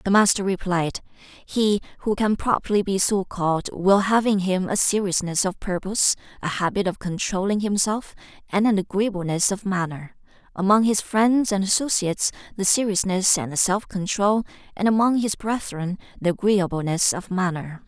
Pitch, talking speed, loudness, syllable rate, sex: 195 Hz, 155 wpm, -22 LUFS, 4.9 syllables/s, female